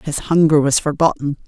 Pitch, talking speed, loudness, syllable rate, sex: 150 Hz, 160 wpm, -16 LUFS, 5.3 syllables/s, female